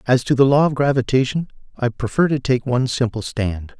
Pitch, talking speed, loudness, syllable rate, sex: 125 Hz, 205 wpm, -19 LUFS, 5.7 syllables/s, male